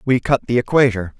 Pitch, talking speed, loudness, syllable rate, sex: 120 Hz, 200 wpm, -17 LUFS, 6.1 syllables/s, male